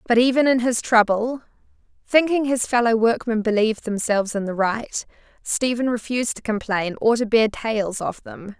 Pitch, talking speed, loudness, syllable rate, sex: 230 Hz, 170 wpm, -21 LUFS, 5.0 syllables/s, female